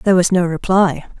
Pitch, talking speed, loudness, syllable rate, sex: 180 Hz, 200 wpm, -15 LUFS, 5.9 syllables/s, female